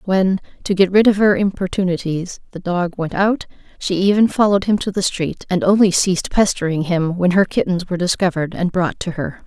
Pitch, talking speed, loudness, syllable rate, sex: 185 Hz, 205 wpm, -17 LUFS, 5.6 syllables/s, female